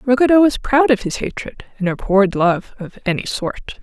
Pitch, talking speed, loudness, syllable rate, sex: 220 Hz, 190 wpm, -17 LUFS, 5.1 syllables/s, female